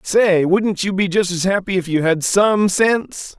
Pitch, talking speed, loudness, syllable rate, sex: 190 Hz, 215 wpm, -17 LUFS, 4.3 syllables/s, male